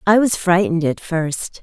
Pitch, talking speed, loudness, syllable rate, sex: 180 Hz, 185 wpm, -18 LUFS, 4.6 syllables/s, female